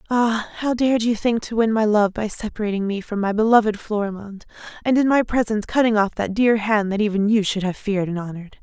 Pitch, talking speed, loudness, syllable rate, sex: 215 Hz, 230 wpm, -20 LUFS, 6.0 syllables/s, female